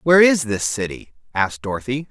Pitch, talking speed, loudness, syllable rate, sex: 120 Hz, 170 wpm, -20 LUFS, 6.1 syllables/s, male